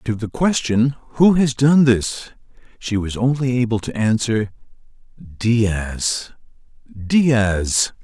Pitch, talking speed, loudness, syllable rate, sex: 120 Hz, 105 wpm, -18 LUFS, 3.1 syllables/s, male